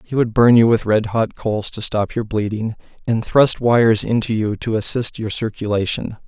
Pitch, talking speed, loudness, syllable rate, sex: 110 Hz, 200 wpm, -18 LUFS, 5.0 syllables/s, male